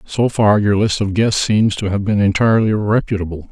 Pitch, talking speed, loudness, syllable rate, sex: 105 Hz, 205 wpm, -16 LUFS, 5.3 syllables/s, male